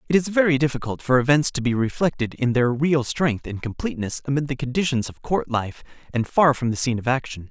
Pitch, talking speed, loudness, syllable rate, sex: 130 Hz, 225 wpm, -22 LUFS, 6.0 syllables/s, male